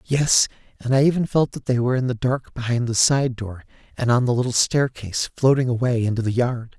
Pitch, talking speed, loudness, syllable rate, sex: 125 Hz, 220 wpm, -21 LUFS, 5.7 syllables/s, male